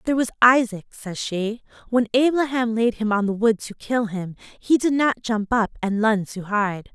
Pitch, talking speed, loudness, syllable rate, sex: 225 Hz, 205 wpm, -21 LUFS, 4.6 syllables/s, female